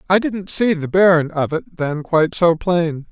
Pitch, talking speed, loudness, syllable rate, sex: 170 Hz, 210 wpm, -17 LUFS, 4.5 syllables/s, male